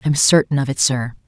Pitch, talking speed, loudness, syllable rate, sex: 135 Hz, 235 wpm, -16 LUFS, 5.5 syllables/s, female